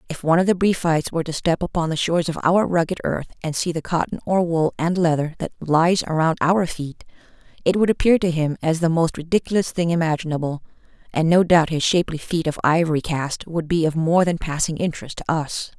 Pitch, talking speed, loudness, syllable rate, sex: 165 Hz, 215 wpm, -21 LUFS, 6.0 syllables/s, female